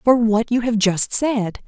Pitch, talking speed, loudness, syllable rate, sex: 225 Hz, 215 wpm, -18 LUFS, 3.9 syllables/s, female